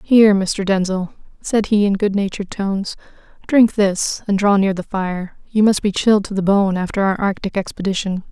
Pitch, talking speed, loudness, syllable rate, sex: 200 Hz, 190 wpm, -18 LUFS, 5.2 syllables/s, female